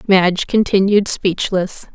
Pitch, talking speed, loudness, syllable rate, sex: 190 Hz, 90 wpm, -16 LUFS, 4.0 syllables/s, female